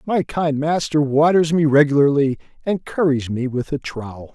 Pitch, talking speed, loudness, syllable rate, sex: 145 Hz, 165 wpm, -18 LUFS, 4.8 syllables/s, male